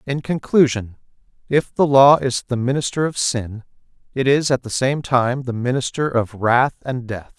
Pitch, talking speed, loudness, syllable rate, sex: 130 Hz, 180 wpm, -19 LUFS, 4.5 syllables/s, male